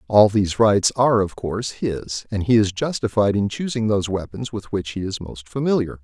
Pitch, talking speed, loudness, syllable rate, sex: 105 Hz, 210 wpm, -21 LUFS, 5.4 syllables/s, male